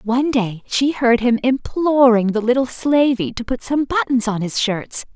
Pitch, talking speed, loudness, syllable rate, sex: 245 Hz, 185 wpm, -18 LUFS, 4.5 syllables/s, female